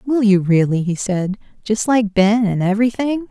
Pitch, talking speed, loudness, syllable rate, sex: 210 Hz, 165 wpm, -17 LUFS, 4.8 syllables/s, female